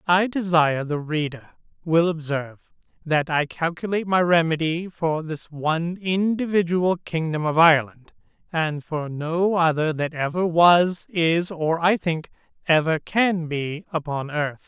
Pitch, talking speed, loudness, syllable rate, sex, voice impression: 165 Hz, 140 wpm, -22 LUFS, 4.2 syllables/s, male, masculine, adult-like, slightly middle-aged, thick, slightly tensed, slightly weak, bright, slightly soft, slightly clear, fluent, cool, intellectual, slightly refreshing, sincere, very calm, slightly mature, friendly, reassuring, unique, elegant, slightly wild, slightly sweet, lively, kind, slightly modest